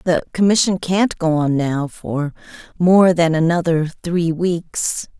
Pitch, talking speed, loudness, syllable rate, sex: 170 Hz, 140 wpm, -17 LUFS, 3.6 syllables/s, female